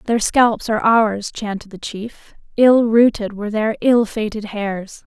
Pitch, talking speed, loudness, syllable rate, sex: 215 Hz, 165 wpm, -17 LUFS, 4.0 syllables/s, female